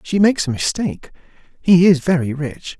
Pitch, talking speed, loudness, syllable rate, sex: 165 Hz, 170 wpm, -17 LUFS, 5.5 syllables/s, male